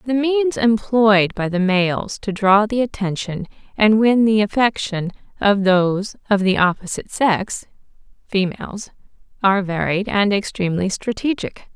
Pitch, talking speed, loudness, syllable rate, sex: 205 Hz, 135 wpm, -18 LUFS, 4.5 syllables/s, female